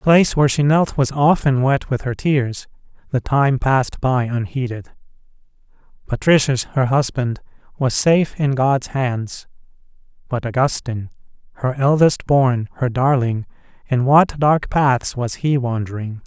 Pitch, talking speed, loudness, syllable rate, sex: 130 Hz, 140 wpm, -18 LUFS, 4.4 syllables/s, male